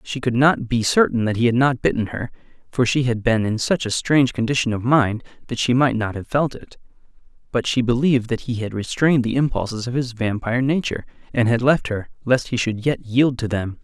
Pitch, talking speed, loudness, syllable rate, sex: 120 Hz, 230 wpm, -20 LUFS, 5.7 syllables/s, male